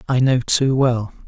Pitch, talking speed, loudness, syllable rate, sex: 125 Hz, 190 wpm, -17 LUFS, 4.0 syllables/s, male